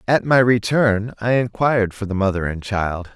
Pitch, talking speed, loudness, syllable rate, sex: 110 Hz, 190 wpm, -19 LUFS, 4.8 syllables/s, male